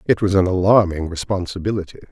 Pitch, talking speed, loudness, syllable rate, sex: 95 Hz, 140 wpm, -19 LUFS, 6.3 syllables/s, male